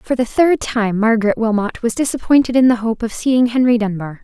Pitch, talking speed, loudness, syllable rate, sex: 230 Hz, 215 wpm, -16 LUFS, 5.5 syllables/s, female